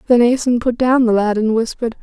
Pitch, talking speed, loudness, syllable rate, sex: 235 Hz, 235 wpm, -15 LUFS, 6.2 syllables/s, female